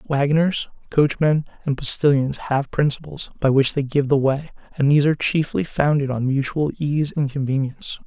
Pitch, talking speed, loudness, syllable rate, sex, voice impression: 140 Hz, 165 wpm, -20 LUFS, 5.3 syllables/s, male, masculine, adult-like, thick, relaxed, dark, muffled, intellectual, calm, slightly reassuring, slightly wild, kind, modest